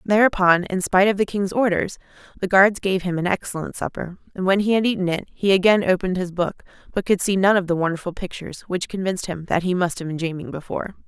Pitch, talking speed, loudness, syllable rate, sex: 185 Hz, 235 wpm, -21 LUFS, 6.4 syllables/s, female